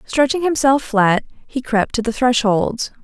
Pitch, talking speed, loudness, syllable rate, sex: 245 Hz, 160 wpm, -17 LUFS, 4.2 syllables/s, female